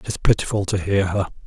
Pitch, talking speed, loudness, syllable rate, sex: 95 Hz, 245 wpm, -21 LUFS, 6.5 syllables/s, male